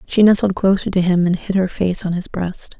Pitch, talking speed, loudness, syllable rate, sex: 185 Hz, 255 wpm, -17 LUFS, 5.2 syllables/s, female